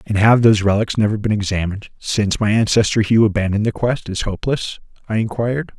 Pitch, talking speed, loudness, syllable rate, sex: 105 Hz, 185 wpm, -17 LUFS, 6.4 syllables/s, male